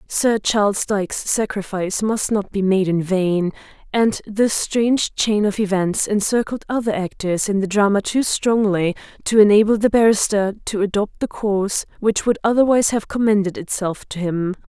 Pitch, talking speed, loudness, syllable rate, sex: 205 Hz, 165 wpm, -19 LUFS, 4.9 syllables/s, female